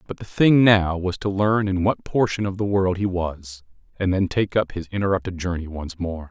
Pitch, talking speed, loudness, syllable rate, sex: 95 Hz, 230 wpm, -22 LUFS, 5.0 syllables/s, male